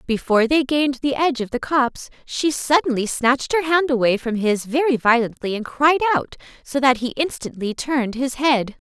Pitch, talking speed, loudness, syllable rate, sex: 260 Hz, 190 wpm, -20 LUFS, 5.4 syllables/s, female